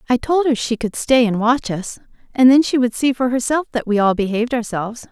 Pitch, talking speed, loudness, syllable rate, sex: 245 Hz, 245 wpm, -17 LUFS, 5.8 syllables/s, female